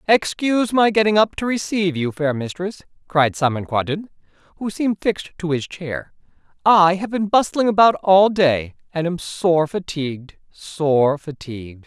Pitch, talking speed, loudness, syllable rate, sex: 175 Hz, 150 wpm, -19 LUFS, 4.7 syllables/s, male